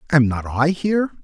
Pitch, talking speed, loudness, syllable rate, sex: 150 Hz, 195 wpm, -19 LUFS, 5.3 syllables/s, male